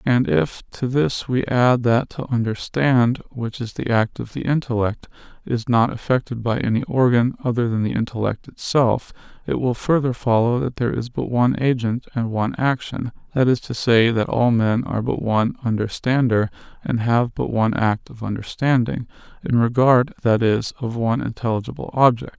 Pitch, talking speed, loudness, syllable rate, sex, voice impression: 120 Hz, 175 wpm, -20 LUFS, 5.0 syllables/s, male, very masculine, very adult-like, middle-aged, thick, slightly relaxed, very weak, dark, soft, muffled, slightly halting, slightly raspy, cool, intellectual, sincere, very calm, mature, friendly, slightly reassuring, elegant, slightly sweet, very kind, very modest